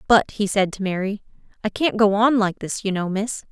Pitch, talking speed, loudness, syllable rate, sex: 205 Hz, 240 wpm, -21 LUFS, 5.1 syllables/s, female